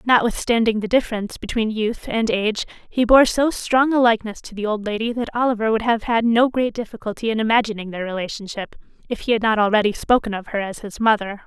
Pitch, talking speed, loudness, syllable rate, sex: 220 Hz, 210 wpm, -20 LUFS, 6.2 syllables/s, female